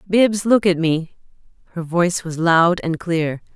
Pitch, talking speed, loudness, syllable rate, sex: 175 Hz, 170 wpm, -18 LUFS, 4.0 syllables/s, female